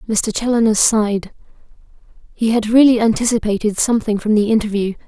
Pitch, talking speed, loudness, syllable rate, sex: 220 Hz, 130 wpm, -16 LUFS, 6.0 syllables/s, female